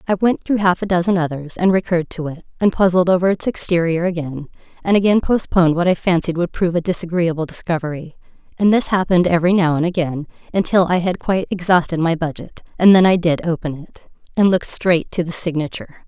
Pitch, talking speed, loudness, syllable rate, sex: 175 Hz, 200 wpm, -17 LUFS, 6.3 syllables/s, female